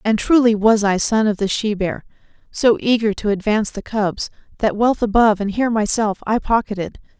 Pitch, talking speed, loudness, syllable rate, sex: 215 Hz, 190 wpm, -18 LUFS, 5.4 syllables/s, female